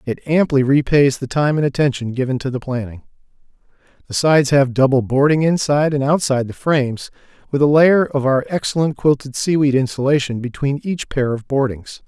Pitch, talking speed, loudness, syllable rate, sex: 135 Hz, 175 wpm, -17 LUFS, 5.5 syllables/s, male